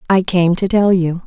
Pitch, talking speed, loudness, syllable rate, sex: 185 Hz, 235 wpm, -14 LUFS, 4.7 syllables/s, female